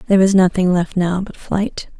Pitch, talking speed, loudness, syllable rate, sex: 185 Hz, 210 wpm, -17 LUFS, 5.2 syllables/s, female